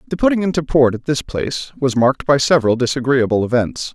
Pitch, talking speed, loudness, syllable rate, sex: 135 Hz, 200 wpm, -17 LUFS, 6.2 syllables/s, male